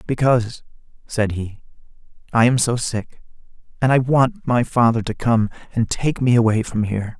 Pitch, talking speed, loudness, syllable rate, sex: 120 Hz, 165 wpm, -19 LUFS, 4.9 syllables/s, male